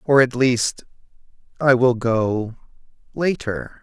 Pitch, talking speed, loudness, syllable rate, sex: 125 Hz, 95 wpm, -19 LUFS, 3.3 syllables/s, male